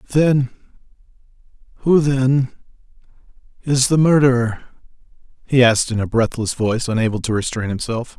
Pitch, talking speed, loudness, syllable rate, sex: 125 Hz, 115 wpm, -18 LUFS, 5.3 syllables/s, male